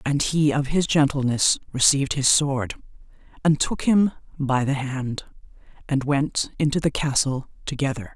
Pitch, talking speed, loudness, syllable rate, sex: 140 Hz, 145 wpm, -22 LUFS, 4.6 syllables/s, female